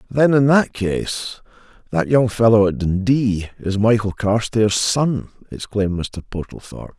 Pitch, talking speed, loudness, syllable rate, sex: 110 Hz, 130 wpm, -18 LUFS, 4.3 syllables/s, male